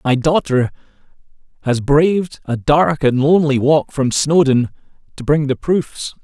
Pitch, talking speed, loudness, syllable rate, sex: 145 Hz, 145 wpm, -16 LUFS, 4.3 syllables/s, male